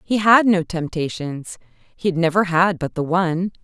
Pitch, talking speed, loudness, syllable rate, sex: 175 Hz, 180 wpm, -19 LUFS, 4.5 syllables/s, female